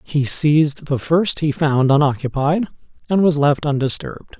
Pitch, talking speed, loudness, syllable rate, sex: 150 Hz, 150 wpm, -17 LUFS, 4.6 syllables/s, male